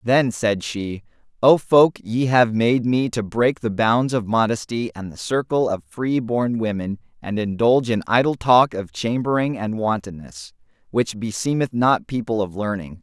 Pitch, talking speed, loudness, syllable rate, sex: 115 Hz, 170 wpm, -20 LUFS, 4.4 syllables/s, male